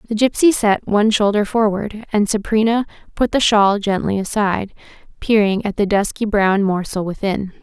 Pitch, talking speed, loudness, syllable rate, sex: 210 Hz, 155 wpm, -17 LUFS, 5.0 syllables/s, female